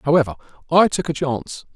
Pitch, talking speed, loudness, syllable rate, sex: 150 Hz, 170 wpm, -19 LUFS, 6.2 syllables/s, male